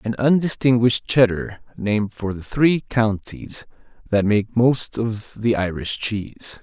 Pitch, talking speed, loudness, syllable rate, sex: 115 Hz, 135 wpm, -20 LUFS, 4.1 syllables/s, male